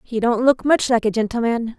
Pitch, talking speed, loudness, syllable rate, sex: 235 Hz, 235 wpm, -18 LUFS, 5.3 syllables/s, female